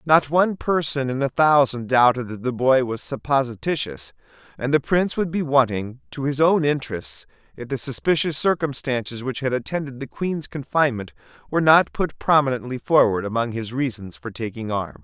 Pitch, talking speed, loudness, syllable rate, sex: 130 Hz, 170 wpm, -22 LUFS, 5.3 syllables/s, male